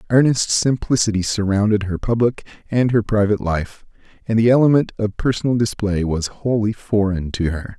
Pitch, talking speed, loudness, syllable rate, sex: 105 Hz, 155 wpm, -19 LUFS, 5.3 syllables/s, male